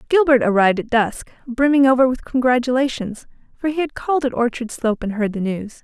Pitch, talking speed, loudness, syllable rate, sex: 250 Hz, 195 wpm, -18 LUFS, 5.9 syllables/s, female